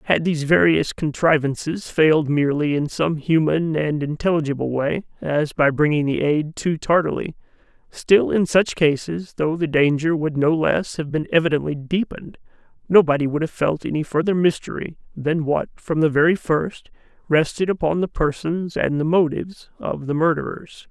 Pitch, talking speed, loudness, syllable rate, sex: 155 Hz, 160 wpm, -20 LUFS, 4.9 syllables/s, male